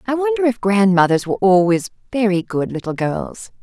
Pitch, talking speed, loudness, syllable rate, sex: 205 Hz, 165 wpm, -17 LUFS, 5.4 syllables/s, female